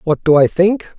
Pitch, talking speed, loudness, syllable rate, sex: 180 Hz, 245 wpm, -13 LUFS, 4.5 syllables/s, male